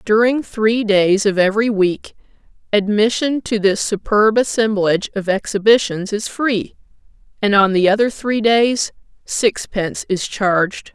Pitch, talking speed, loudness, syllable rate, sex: 210 Hz, 130 wpm, -17 LUFS, 4.3 syllables/s, female